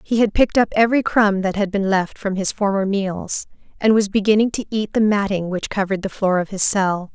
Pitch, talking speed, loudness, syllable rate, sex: 200 Hz, 235 wpm, -19 LUFS, 5.6 syllables/s, female